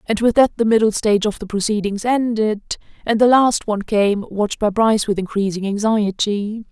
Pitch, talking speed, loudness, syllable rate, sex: 215 Hz, 180 wpm, -18 LUFS, 5.5 syllables/s, female